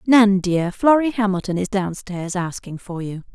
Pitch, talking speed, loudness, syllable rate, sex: 195 Hz, 160 wpm, -20 LUFS, 4.5 syllables/s, female